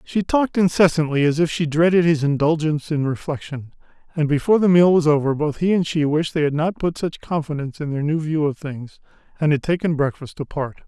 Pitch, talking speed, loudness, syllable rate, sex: 155 Hz, 215 wpm, -20 LUFS, 5.9 syllables/s, male